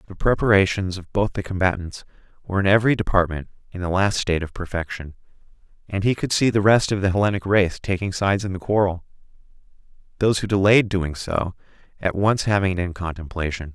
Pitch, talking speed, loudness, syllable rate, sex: 95 Hz, 185 wpm, -21 LUFS, 6.2 syllables/s, male